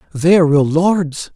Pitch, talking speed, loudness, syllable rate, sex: 165 Hz, 135 wpm, -14 LUFS, 4.7 syllables/s, male